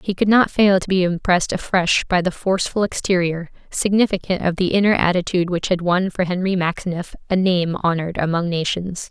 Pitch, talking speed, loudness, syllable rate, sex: 180 Hz, 185 wpm, -19 LUFS, 5.7 syllables/s, female